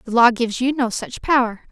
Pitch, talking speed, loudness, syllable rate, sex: 240 Hz, 245 wpm, -19 LUFS, 5.7 syllables/s, female